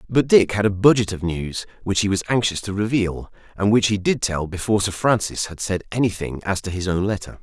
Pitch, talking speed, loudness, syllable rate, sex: 100 Hz, 235 wpm, -21 LUFS, 5.7 syllables/s, male